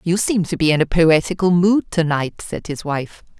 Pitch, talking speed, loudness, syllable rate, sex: 170 Hz, 230 wpm, -18 LUFS, 4.8 syllables/s, female